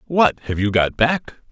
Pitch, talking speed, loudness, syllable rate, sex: 130 Hz, 200 wpm, -19 LUFS, 3.8 syllables/s, male